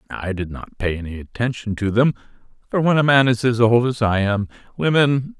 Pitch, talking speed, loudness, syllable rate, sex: 115 Hz, 210 wpm, -19 LUFS, 5.4 syllables/s, male